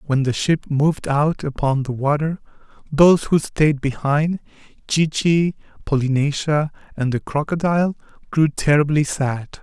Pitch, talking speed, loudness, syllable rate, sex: 150 Hz, 130 wpm, -19 LUFS, 4.5 syllables/s, male